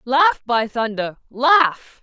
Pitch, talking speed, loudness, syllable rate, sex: 250 Hz, 120 wpm, -18 LUFS, 2.9 syllables/s, female